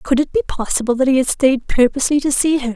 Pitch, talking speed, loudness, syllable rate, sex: 265 Hz, 260 wpm, -16 LUFS, 6.5 syllables/s, female